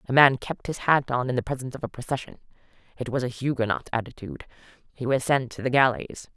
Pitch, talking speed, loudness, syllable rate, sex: 125 Hz, 210 wpm, -25 LUFS, 6.4 syllables/s, female